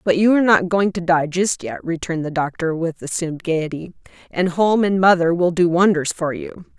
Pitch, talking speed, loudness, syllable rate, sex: 175 Hz, 210 wpm, -18 LUFS, 5.3 syllables/s, female